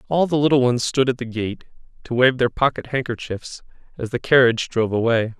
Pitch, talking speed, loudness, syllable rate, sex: 125 Hz, 200 wpm, -20 LUFS, 5.8 syllables/s, male